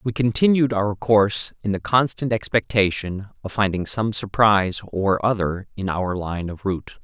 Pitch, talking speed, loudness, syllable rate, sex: 105 Hz, 160 wpm, -21 LUFS, 4.7 syllables/s, male